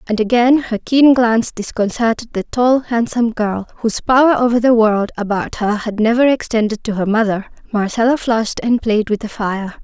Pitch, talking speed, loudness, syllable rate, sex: 225 Hz, 185 wpm, -16 LUFS, 5.2 syllables/s, female